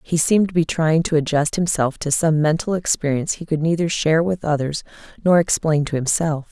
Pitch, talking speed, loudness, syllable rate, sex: 160 Hz, 205 wpm, -19 LUFS, 5.7 syllables/s, female